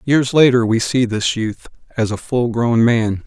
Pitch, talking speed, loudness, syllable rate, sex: 120 Hz, 200 wpm, -16 LUFS, 4.2 syllables/s, male